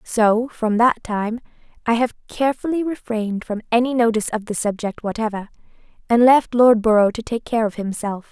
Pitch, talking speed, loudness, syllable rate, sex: 230 Hz, 175 wpm, -19 LUFS, 5.5 syllables/s, female